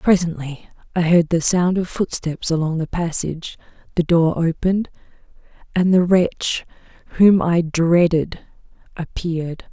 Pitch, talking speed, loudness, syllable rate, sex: 170 Hz, 125 wpm, -19 LUFS, 4.5 syllables/s, female